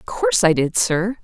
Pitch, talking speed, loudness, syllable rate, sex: 175 Hz, 245 wpm, -18 LUFS, 5.1 syllables/s, female